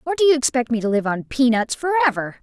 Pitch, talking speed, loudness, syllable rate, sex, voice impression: 260 Hz, 250 wpm, -19 LUFS, 6.1 syllables/s, female, very feminine, slightly young, slightly fluent, slightly cute, slightly refreshing, friendly, slightly lively